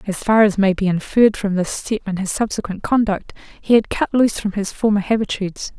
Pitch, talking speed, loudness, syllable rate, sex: 205 Hz, 220 wpm, -18 LUFS, 5.8 syllables/s, female